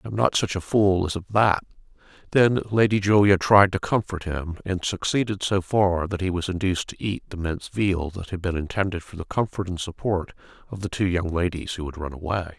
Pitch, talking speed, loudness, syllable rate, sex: 95 Hz, 220 wpm, -24 LUFS, 5.5 syllables/s, male